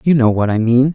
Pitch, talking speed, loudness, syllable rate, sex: 125 Hz, 320 wpm, -14 LUFS, 5.9 syllables/s, male